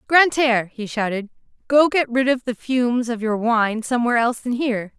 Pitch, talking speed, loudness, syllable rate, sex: 240 Hz, 195 wpm, -20 LUFS, 6.3 syllables/s, female